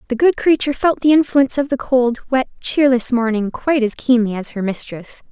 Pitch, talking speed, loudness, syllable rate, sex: 250 Hz, 205 wpm, -17 LUFS, 5.7 syllables/s, female